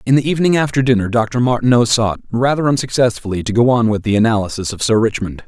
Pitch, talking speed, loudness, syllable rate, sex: 115 Hz, 210 wpm, -15 LUFS, 6.5 syllables/s, male